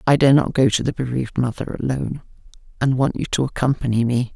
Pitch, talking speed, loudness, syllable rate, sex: 130 Hz, 205 wpm, -20 LUFS, 6.5 syllables/s, female